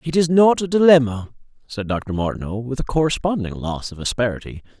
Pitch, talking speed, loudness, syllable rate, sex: 130 Hz, 175 wpm, -19 LUFS, 5.7 syllables/s, male